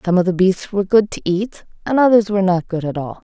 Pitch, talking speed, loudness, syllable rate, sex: 190 Hz, 270 wpm, -17 LUFS, 6.1 syllables/s, female